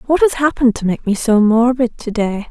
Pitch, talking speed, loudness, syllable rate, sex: 230 Hz, 240 wpm, -15 LUFS, 5.5 syllables/s, female